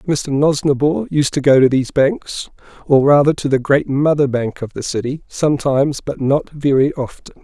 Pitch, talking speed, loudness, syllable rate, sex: 140 Hz, 185 wpm, -16 LUFS, 4.9 syllables/s, male